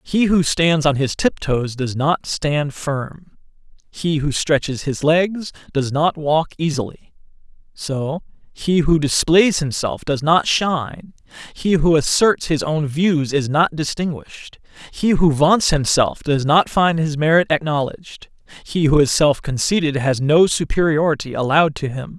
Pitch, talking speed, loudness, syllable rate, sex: 155 Hz, 155 wpm, -18 LUFS, 4.3 syllables/s, male